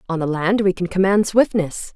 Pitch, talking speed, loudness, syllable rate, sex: 185 Hz, 215 wpm, -18 LUFS, 5.1 syllables/s, female